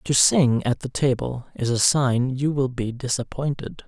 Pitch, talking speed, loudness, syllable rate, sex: 130 Hz, 185 wpm, -22 LUFS, 4.3 syllables/s, male